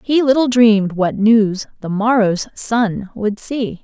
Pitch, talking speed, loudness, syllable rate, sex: 220 Hz, 155 wpm, -16 LUFS, 3.7 syllables/s, female